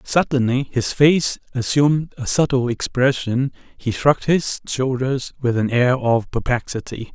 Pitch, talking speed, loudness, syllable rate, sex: 130 Hz, 135 wpm, -19 LUFS, 4.3 syllables/s, male